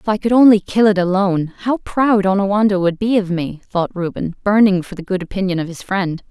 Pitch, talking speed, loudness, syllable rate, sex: 195 Hz, 230 wpm, -16 LUFS, 5.6 syllables/s, female